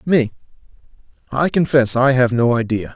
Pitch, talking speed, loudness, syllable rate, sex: 125 Hz, 140 wpm, -16 LUFS, 4.8 syllables/s, male